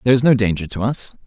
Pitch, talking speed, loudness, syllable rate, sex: 115 Hz, 285 wpm, -18 LUFS, 7.3 syllables/s, male